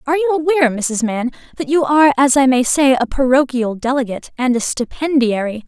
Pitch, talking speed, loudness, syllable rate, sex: 265 Hz, 190 wpm, -16 LUFS, 5.6 syllables/s, female